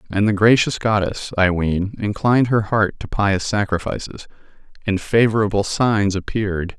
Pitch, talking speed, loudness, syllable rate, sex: 105 Hz, 140 wpm, -19 LUFS, 4.7 syllables/s, male